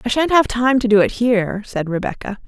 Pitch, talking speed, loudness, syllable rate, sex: 225 Hz, 240 wpm, -17 LUFS, 5.6 syllables/s, female